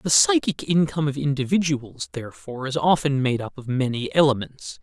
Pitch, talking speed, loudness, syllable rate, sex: 140 Hz, 160 wpm, -22 LUFS, 5.5 syllables/s, male